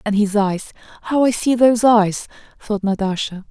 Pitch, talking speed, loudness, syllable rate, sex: 215 Hz, 155 wpm, -17 LUFS, 4.9 syllables/s, female